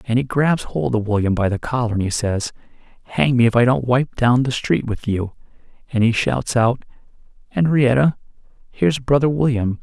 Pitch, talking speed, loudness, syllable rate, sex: 120 Hz, 190 wpm, -19 LUFS, 4.7 syllables/s, male